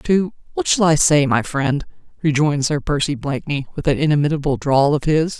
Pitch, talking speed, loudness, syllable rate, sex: 145 Hz, 180 wpm, -18 LUFS, 5.5 syllables/s, female